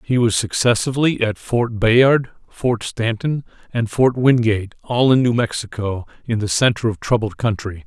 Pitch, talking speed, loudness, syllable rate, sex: 115 Hz, 160 wpm, -18 LUFS, 4.7 syllables/s, male